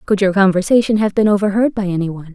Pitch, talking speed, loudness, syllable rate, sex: 200 Hz, 230 wpm, -15 LUFS, 7.2 syllables/s, female